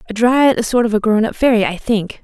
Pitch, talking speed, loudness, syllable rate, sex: 225 Hz, 295 wpm, -15 LUFS, 5.9 syllables/s, female